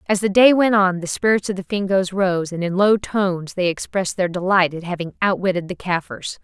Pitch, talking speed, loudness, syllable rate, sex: 190 Hz, 225 wpm, -19 LUFS, 5.4 syllables/s, female